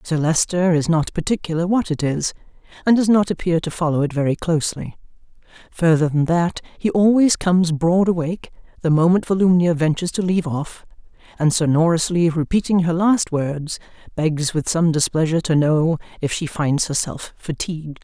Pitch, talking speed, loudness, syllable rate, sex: 165 Hz, 165 wpm, -19 LUFS, 5.4 syllables/s, female